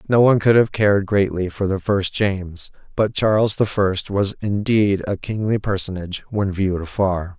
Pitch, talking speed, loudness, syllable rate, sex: 100 Hz, 180 wpm, -19 LUFS, 5.0 syllables/s, male